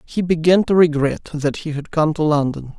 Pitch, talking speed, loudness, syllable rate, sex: 160 Hz, 215 wpm, -18 LUFS, 4.9 syllables/s, male